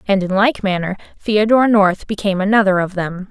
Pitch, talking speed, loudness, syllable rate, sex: 200 Hz, 180 wpm, -16 LUFS, 5.7 syllables/s, female